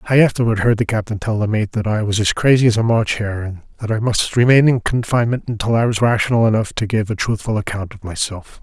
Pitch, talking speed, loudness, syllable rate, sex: 110 Hz, 250 wpm, -17 LUFS, 6.2 syllables/s, male